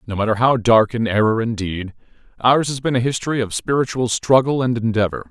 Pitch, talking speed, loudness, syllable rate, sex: 120 Hz, 205 wpm, -18 LUFS, 5.7 syllables/s, male